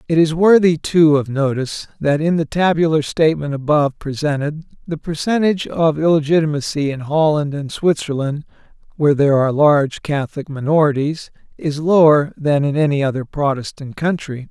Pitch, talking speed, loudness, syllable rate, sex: 150 Hz, 145 wpm, -17 LUFS, 5.5 syllables/s, male